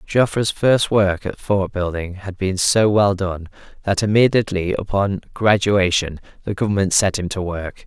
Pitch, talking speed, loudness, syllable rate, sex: 100 Hz, 160 wpm, -19 LUFS, 4.6 syllables/s, male